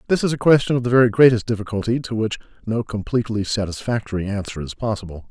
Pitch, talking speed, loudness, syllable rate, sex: 110 Hz, 190 wpm, -20 LUFS, 6.8 syllables/s, male